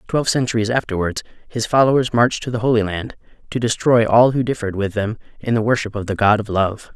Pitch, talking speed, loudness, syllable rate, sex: 115 Hz, 215 wpm, -18 LUFS, 6.3 syllables/s, male